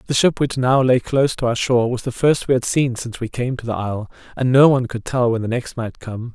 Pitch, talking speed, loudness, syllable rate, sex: 125 Hz, 295 wpm, -19 LUFS, 6.1 syllables/s, male